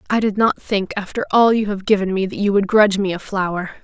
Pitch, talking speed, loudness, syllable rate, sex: 200 Hz, 265 wpm, -18 LUFS, 6.1 syllables/s, female